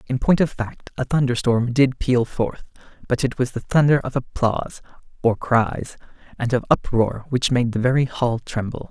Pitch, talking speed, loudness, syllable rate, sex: 125 Hz, 180 wpm, -21 LUFS, 4.7 syllables/s, male